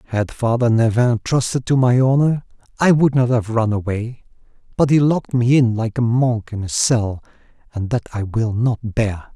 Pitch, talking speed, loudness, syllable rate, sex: 120 Hz, 190 wpm, -18 LUFS, 4.7 syllables/s, male